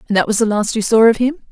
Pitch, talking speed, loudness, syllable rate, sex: 220 Hz, 360 wpm, -14 LUFS, 7.0 syllables/s, female